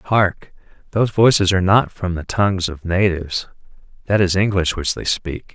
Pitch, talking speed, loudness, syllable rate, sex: 95 Hz, 175 wpm, -18 LUFS, 5.2 syllables/s, male